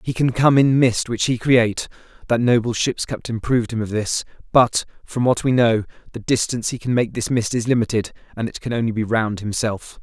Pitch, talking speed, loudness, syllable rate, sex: 115 Hz, 215 wpm, -20 LUFS, 5.5 syllables/s, male